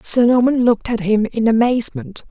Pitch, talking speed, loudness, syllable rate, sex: 235 Hz, 180 wpm, -16 LUFS, 5.6 syllables/s, female